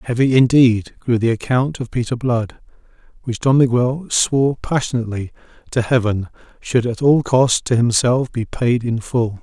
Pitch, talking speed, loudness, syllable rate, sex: 120 Hz, 160 wpm, -17 LUFS, 4.7 syllables/s, male